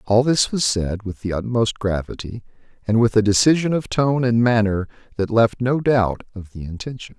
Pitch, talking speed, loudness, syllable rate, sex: 110 Hz, 190 wpm, -19 LUFS, 5.0 syllables/s, male